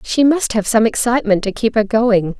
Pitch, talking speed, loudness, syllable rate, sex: 220 Hz, 225 wpm, -15 LUFS, 5.3 syllables/s, female